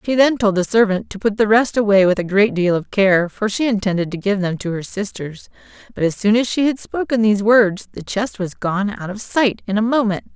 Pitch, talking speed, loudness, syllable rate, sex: 210 Hz, 255 wpm, -18 LUFS, 5.4 syllables/s, female